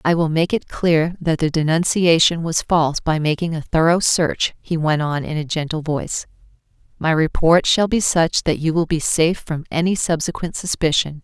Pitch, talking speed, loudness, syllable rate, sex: 160 Hz, 190 wpm, -18 LUFS, 5.0 syllables/s, female